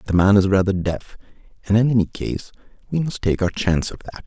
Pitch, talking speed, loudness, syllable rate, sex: 100 Hz, 225 wpm, -20 LUFS, 6.2 syllables/s, male